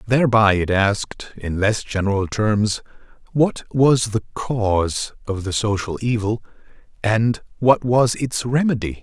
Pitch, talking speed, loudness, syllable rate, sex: 110 Hz, 135 wpm, -20 LUFS, 4.1 syllables/s, male